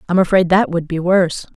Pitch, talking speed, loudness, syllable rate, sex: 180 Hz, 225 wpm, -15 LUFS, 6.1 syllables/s, female